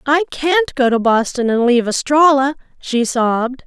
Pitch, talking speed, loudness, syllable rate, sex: 265 Hz, 165 wpm, -15 LUFS, 4.6 syllables/s, female